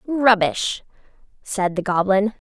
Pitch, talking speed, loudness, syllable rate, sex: 205 Hz, 95 wpm, -20 LUFS, 3.6 syllables/s, female